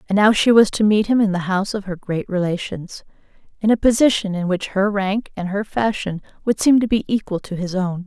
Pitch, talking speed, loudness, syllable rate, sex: 200 Hz, 230 wpm, -19 LUFS, 5.5 syllables/s, female